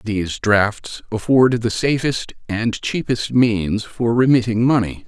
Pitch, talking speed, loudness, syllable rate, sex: 115 Hz, 130 wpm, -18 LUFS, 3.8 syllables/s, male